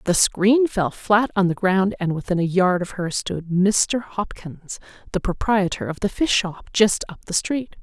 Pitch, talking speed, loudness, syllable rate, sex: 190 Hz, 200 wpm, -21 LUFS, 4.2 syllables/s, female